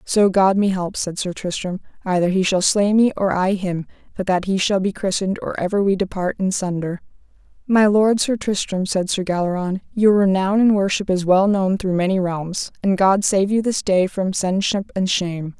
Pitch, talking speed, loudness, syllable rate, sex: 190 Hz, 210 wpm, -19 LUFS, 5.2 syllables/s, female